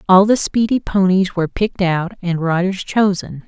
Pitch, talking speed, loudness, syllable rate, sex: 190 Hz, 175 wpm, -17 LUFS, 5.0 syllables/s, female